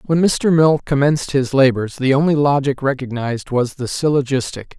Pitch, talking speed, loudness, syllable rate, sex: 135 Hz, 165 wpm, -17 LUFS, 5.2 syllables/s, male